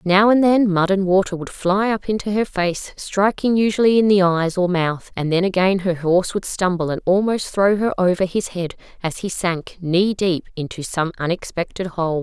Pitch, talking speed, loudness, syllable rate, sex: 185 Hz, 195 wpm, -19 LUFS, 4.9 syllables/s, female